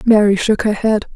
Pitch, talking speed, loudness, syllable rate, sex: 210 Hz, 210 wpm, -15 LUFS, 5.1 syllables/s, female